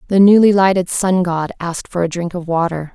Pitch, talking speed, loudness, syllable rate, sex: 180 Hz, 225 wpm, -15 LUFS, 5.6 syllables/s, female